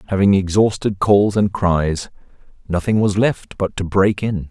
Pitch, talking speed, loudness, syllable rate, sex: 95 Hz, 160 wpm, -17 LUFS, 4.3 syllables/s, male